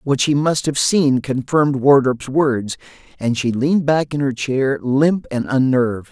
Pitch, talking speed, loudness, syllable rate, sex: 135 Hz, 175 wpm, -17 LUFS, 4.3 syllables/s, male